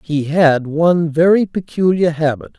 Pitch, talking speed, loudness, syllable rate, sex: 160 Hz, 140 wpm, -15 LUFS, 4.5 syllables/s, male